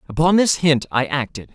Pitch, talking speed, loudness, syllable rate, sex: 140 Hz, 195 wpm, -18 LUFS, 5.4 syllables/s, male